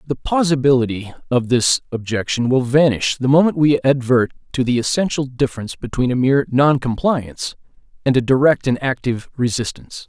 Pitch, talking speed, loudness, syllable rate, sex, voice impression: 130 Hz, 155 wpm, -18 LUFS, 5.7 syllables/s, male, masculine, middle-aged, tensed, powerful, muffled, slightly raspy, mature, slightly friendly, wild, lively, slightly strict, slightly sharp